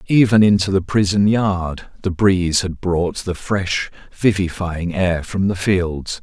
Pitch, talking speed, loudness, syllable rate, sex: 95 Hz, 155 wpm, -18 LUFS, 3.9 syllables/s, male